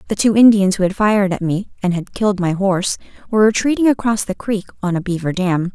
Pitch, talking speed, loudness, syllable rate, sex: 200 Hz, 230 wpm, -17 LUFS, 6.3 syllables/s, female